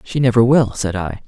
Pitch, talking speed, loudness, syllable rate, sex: 115 Hz, 235 wpm, -16 LUFS, 5.2 syllables/s, male